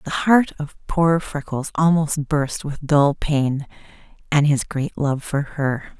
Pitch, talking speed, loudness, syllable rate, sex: 150 Hz, 160 wpm, -20 LUFS, 3.6 syllables/s, female